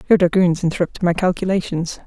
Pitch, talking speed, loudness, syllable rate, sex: 175 Hz, 145 wpm, -18 LUFS, 6.5 syllables/s, female